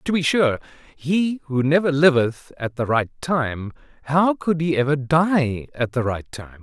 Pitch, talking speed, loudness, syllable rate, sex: 145 Hz, 180 wpm, -21 LUFS, 4.0 syllables/s, male